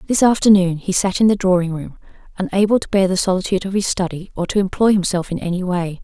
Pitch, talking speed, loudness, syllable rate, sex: 190 Hz, 230 wpm, -17 LUFS, 6.5 syllables/s, female